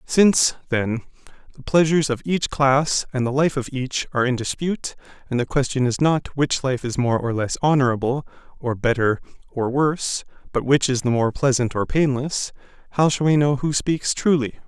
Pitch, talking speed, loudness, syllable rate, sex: 135 Hz, 185 wpm, -21 LUFS, 5.2 syllables/s, male